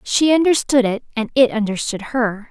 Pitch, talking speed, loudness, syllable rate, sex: 240 Hz, 170 wpm, -17 LUFS, 4.9 syllables/s, female